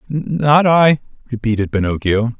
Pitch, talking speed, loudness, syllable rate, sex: 125 Hz, 100 wpm, -15 LUFS, 4.2 syllables/s, male